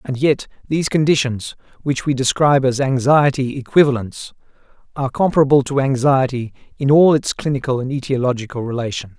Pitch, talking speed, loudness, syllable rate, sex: 135 Hz, 135 wpm, -17 LUFS, 5.8 syllables/s, male